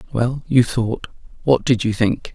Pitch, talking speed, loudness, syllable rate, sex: 120 Hz, 155 wpm, -19 LUFS, 4.0 syllables/s, male